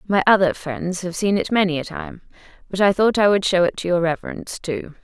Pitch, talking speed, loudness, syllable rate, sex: 185 Hz, 240 wpm, -20 LUFS, 5.7 syllables/s, female